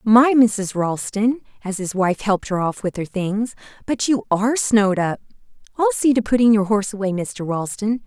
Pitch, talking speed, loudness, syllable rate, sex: 210 Hz, 195 wpm, -20 LUFS, 5.0 syllables/s, female